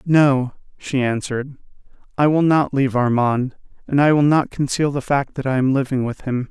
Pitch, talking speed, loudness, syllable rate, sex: 135 Hz, 195 wpm, -19 LUFS, 5.1 syllables/s, male